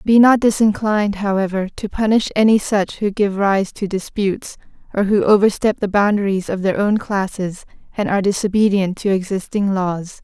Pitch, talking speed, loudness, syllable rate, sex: 200 Hz, 165 wpm, -17 LUFS, 5.1 syllables/s, female